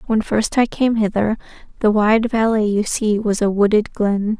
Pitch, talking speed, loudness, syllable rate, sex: 215 Hz, 190 wpm, -18 LUFS, 4.5 syllables/s, female